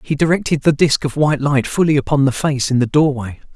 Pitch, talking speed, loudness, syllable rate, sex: 140 Hz, 235 wpm, -16 LUFS, 6.0 syllables/s, male